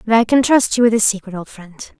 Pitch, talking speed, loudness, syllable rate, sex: 215 Hz, 300 wpm, -14 LUFS, 6.0 syllables/s, female